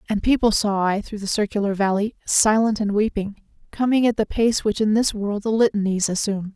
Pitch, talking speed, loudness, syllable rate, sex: 210 Hz, 200 wpm, -21 LUFS, 5.5 syllables/s, female